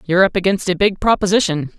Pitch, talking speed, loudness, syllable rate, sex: 185 Hz, 200 wpm, -16 LUFS, 6.7 syllables/s, female